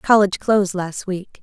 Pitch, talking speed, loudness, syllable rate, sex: 190 Hz, 170 wpm, -19 LUFS, 5.0 syllables/s, female